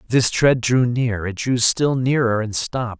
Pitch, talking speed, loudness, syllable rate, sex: 120 Hz, 200 wpm, -19 LUFS, 4.3 syllables/s, male